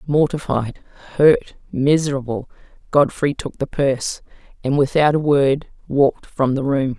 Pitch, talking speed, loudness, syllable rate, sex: 140 Hz, 130 wpm, -19 LUFS, 4.5 syllables/s, female